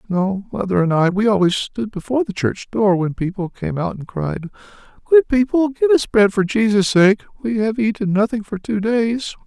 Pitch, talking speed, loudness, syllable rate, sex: 185 Hz, 195 wpm, -18 LUFS, 4.9 syllables/s, male